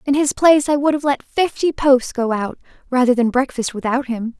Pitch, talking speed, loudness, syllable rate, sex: 265 Hz, 220 wpm, -17 LUFS, 5.3 syllables/s, female